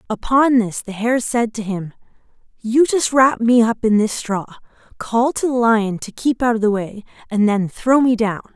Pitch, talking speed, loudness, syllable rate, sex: 230 Hz, 210 wpm, -17 LUFS, 4.4 syllables/s, female